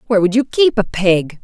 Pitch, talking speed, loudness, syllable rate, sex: 205 Hz, 250 wpm, -15 LUFS, 5.9 syllables/s, female